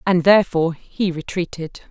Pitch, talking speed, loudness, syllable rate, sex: 175 Hz, 125 wpm, -19 LUFS, 5.3 syllables/s, female